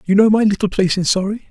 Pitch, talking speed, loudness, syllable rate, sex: 200 Hz, 280 wpm, -16 LUFS, 7.3 syllables/s, male